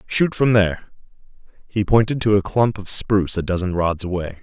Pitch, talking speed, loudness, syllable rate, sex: 100 Hz, 190 wpm, -19 LUFS, 5.4 syllables/s, male